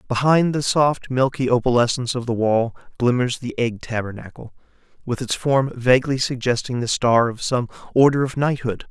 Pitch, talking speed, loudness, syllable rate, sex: 125 Hz, 160 wpm, -20 LUFS, 5.2 syllables/s, male